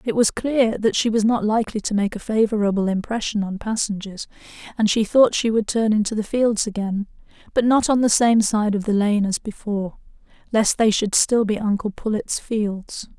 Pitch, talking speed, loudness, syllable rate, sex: 215 Hz, 200 wpm, -20 LUFS, 5.1 syllables/s, female